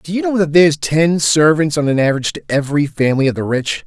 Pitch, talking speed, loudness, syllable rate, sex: 155 Hz, 250 wpm, -15 LUFS, 6.6 syllables/s, male